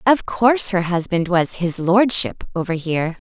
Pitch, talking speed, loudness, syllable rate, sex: 190 Hz, 165 wpm, -19 LUFS, 4.7 syllables/s, female